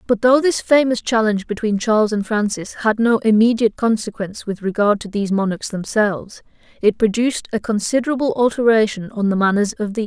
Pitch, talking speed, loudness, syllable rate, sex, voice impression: 220 Hz, 180 wpm, -18 LUFS, 6.1 syllables/s, female, very feminine, very young, thin, tensed, slightly powerful, slightly bright, slightly soft, clear, slightly fluent, cute, slightly cool, intellectual, very refreshing, sincere, calm, friendly, reassuring, unique, very elegant, very wild, sweet, lively, strict, slightly intense, sharp, slightly modest, light